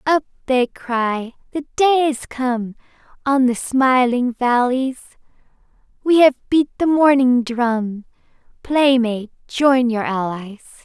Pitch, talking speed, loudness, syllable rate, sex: 255 Hz, 115 wpm, -18 LUFS, 3.5 syllables/s, female